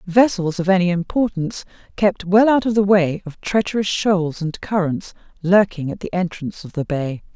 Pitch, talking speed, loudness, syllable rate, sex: 185 Hz, 180 wpm, -19 LUFS, 5.0 syllables/s, female